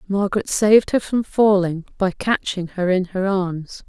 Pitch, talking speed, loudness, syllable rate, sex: 190 Hz, 170 wpm, -19 LUFS, 4.5 syllables/s, female